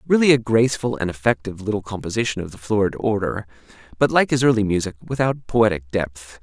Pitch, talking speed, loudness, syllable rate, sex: 105 Hz, 175 wpm, -21 LUFS, 6.2 syllables/s, male